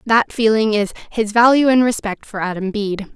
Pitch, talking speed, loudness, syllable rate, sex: 215 Hz, 190 wpm, -17 LUFS, 5.3 syllables/s, female